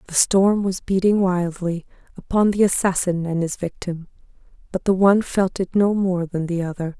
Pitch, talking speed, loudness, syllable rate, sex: 185 Hz, 180 wpm, -20 LUFS, 4.9 syllables/s, female